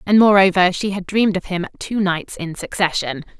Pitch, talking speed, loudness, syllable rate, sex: 185 Hz, 195 wpm, -18 LUFS, 5.4 syllables/s, female